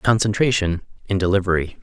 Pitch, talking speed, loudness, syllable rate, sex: 100 Hz, 100 wpm, -20 LUFS, 5.8 syllables/s, male